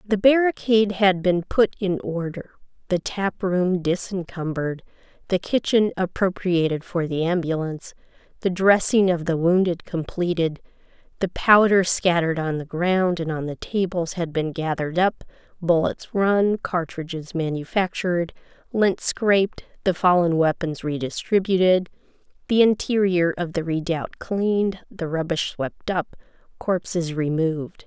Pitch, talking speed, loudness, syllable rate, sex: 175 Hz, 130 wpm, -22 LUFS, 4.5 syllables/s, female